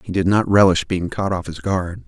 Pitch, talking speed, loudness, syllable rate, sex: 90 Hz, 260 wpm, -19 LUFS, 5.1 syllables/s, male